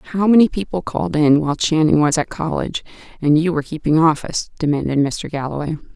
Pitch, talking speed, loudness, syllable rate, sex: 155 Hz, 180 wpm, -18 LUFS, 6.2 syllables/s, female